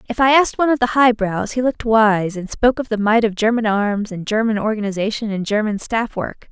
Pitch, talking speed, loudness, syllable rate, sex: 220 Hz, 230 wpm, -18 LUFS, 5.9 syllables/s, female